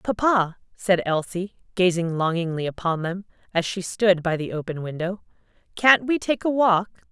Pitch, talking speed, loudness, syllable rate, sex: 185 Hz, 160 wpm, -23 LUFS, 4.7 syllables/s, female